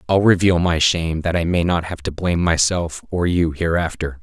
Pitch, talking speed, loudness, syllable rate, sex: 85 Hz, 215 wpm, -19 LUFS, 5.3 syllables/s, male